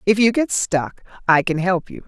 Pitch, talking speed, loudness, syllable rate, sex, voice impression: 195 Hz, 230 wpm, -19 LUFS, 4.7 syllables/s, female, feminine, middle-aged, slightly relaxed, powerful, slightly soft, clear, intellectual, lively, slightly intense, sharp